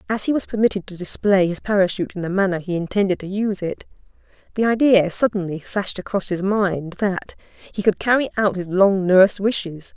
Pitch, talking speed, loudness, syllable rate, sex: 195 Hz, 195 wpm, -20 LUFS, 5.7 syllables/s, female